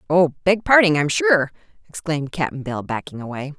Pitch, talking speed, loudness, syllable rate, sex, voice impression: 160 Hz, 165 wpm, -19 LUFS, 5.2 syllables/s, female, very feminine, adult-like, slightly middle-aged, thin, very tensed, very powerful, bright, hard, very clear, fluent, very cool, intellectual, very refreshing, slightly calm, friendly, reassuring, slightly unique, elegant, slightly wild, slightly sweet, very lively, slightly strict